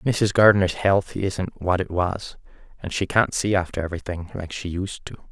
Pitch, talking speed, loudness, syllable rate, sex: 95 Hz, 205 wpm, -23 LUFS, 5.2 syllables/s, male